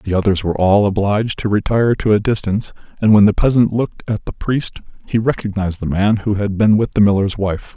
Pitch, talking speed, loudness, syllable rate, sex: 105 Hz, 225 wpm, -16 LUFS, 6.0 syllables/s, male